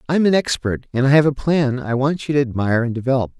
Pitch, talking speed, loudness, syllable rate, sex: 135 Hz, 280 wpm, -18 LUFS, 6.8 syllables/s, male